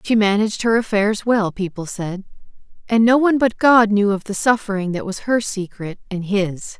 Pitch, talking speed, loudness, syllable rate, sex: 205 Hz, 195 wpm, -18 LUFS, 5.1 syllables/s, female